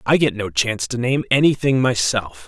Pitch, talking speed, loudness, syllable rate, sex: 120 Hz, 195 wpm, -18 LUFS, 5.2 syllables/s, male